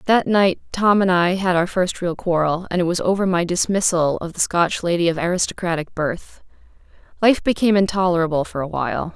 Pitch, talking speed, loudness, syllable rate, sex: 180 Hz, 190 wpm, -19 LUFS, 5.6 syllables/s, female